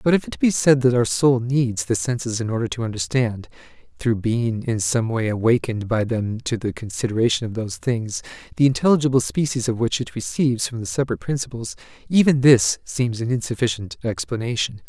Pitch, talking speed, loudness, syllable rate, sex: 120 Hz, 185 wpm, -21 LUFS, 5.7 syllables/s, male